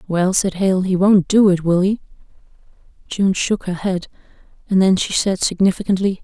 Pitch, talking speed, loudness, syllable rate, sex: 190 Hz, 175 wpm, -17 LUFS, 5.0 syllables/s, female